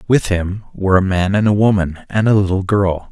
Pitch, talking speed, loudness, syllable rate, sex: 100 Hz, 230 wpm, -16 LUFS, 5.5 syllables/s, male